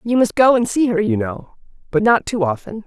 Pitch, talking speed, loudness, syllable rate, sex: 235 Hz, 250 wpm, -17 LUFS, 5.5 syllables/s, female